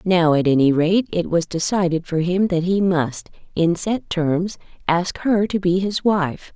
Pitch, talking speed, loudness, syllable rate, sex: 175 Hz, 190 wpm, -19 LUFS, 4.1 syllables/s, female